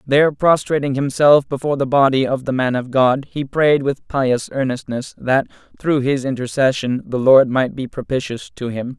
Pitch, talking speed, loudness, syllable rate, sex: 135 Hz, 180 wpm, -17 LUFS, 4.9 syllables/s, male